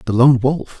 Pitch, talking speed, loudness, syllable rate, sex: 130 Hz, 225 wpm, -15 LUFS, 4.8 syllables/s, male